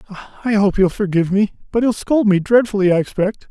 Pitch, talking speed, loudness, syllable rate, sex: 205 Hz, 205 wpm, -17 LUFS, 7.0 syllables/s, male